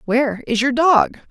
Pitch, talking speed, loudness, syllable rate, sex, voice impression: 260 Hz, 185 wpm, -17 LUFS, 4.6 syllables/s, female, feminine, adult-like, slightly clear, slightly intellectual, reassuring